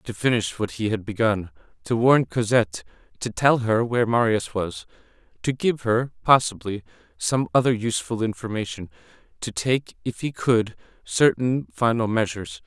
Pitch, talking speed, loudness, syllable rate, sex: 115 Hz, 145 wpm, -23 LUFS, 4.9 syllables/s, male